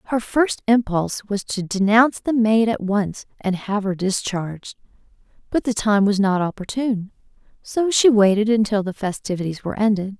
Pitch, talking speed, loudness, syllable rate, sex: 210 Hz, 165 wpm, -20 LUFS, 5.1 syllables/s, female